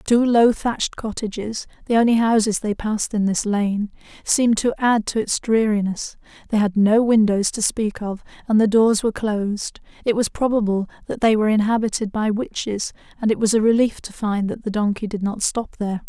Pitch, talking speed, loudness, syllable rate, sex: 215 Hz, 190 wpm, -20 LUFS, 5.4 syllables/s, female